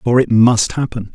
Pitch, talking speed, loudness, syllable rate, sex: 115 Hz, 210 wpm, -14 LUFS, 4.8 syllables/s, male